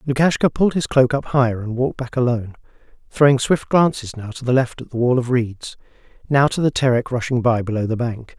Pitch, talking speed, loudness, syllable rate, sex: 125 Hz, 220 wpm, -19 LUFS, 6.0 syllables/s, male